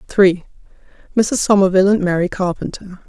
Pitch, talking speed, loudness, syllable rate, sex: 190 Hz, 115 wpm, -16 LUFS, 7.2 syllables/s, female